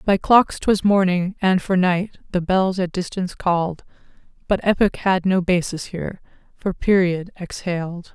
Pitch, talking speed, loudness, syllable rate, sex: 185 Hz, 160 wpm, -20 LUFS, 4.7 syllables/s, female